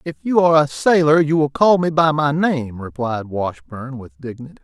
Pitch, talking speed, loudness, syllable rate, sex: 140 Hz, 205 wpm, -17 LUFS, 5.0 syllables/s, male